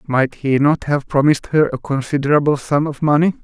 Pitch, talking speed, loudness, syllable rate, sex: 145 Hz, 190 wpm, -17 LUFS, 5.6 syllables/s, male